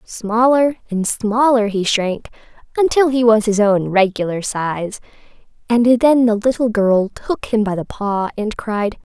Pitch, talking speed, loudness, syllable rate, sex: 220 Hz, 155 wpm, -16 LUFS, 4.0 syllables/s, female